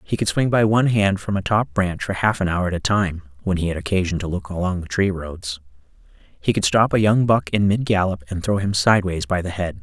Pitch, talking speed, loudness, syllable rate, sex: 95 Hz, 265 wpm, -20 LUFS, 5.7 syllables/s, male